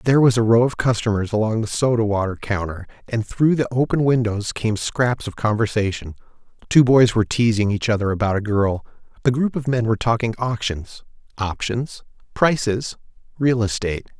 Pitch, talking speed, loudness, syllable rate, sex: 115 Hz, 170 wpm, -20 LUFS, 5.3 syllables/s, male